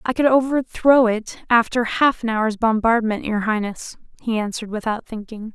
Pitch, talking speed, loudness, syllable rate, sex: 230 Hz, 160 wpm, -19 LUFS, 4.9 syllables/s, female